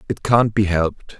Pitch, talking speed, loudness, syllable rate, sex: 100 Hz, 200 wpm, -18 LUFS, 5.0 syllables/s, male